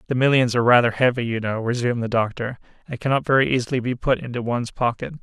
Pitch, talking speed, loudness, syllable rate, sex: 120 Hz, 220 wpm, -21 LUFS, 7.1 syllables/s, male